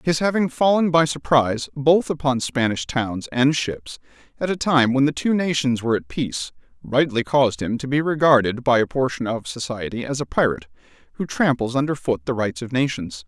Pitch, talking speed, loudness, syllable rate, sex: 130 Hz, 195 wpm, -21 LUFS, 5.4 syllables/s, male